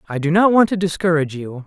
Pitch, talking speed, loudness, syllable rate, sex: 170 Hz, 250 wpm, -17 LUFS, 6.7 syllables/s, male